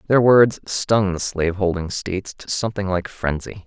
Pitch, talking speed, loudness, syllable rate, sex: 95 Hz, 180 wpm, -20 LUFS, 5.0 syllables/s, male